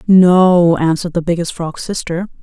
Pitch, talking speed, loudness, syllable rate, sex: 170 Hz, 150 wpm, -14 LUFS, 4.6 syllables/s, female